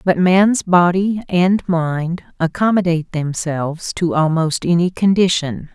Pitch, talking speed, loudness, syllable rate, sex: 175 Hz, 115 wpm, -17 LUFS, 4.1 syllables/s, female